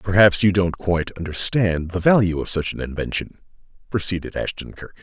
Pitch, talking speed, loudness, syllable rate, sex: 95 Hz, 165 wpm, -21 LUFS, 5.5 syllables/s, male